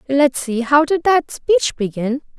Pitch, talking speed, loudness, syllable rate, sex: 280 Hz, 150 wpm, -17 LUFS, 3.9 syllables/s, female